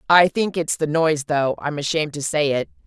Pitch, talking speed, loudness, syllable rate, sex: 155 Hz, 230 wpm, -20 LUFS, 5.6 syllables/s, female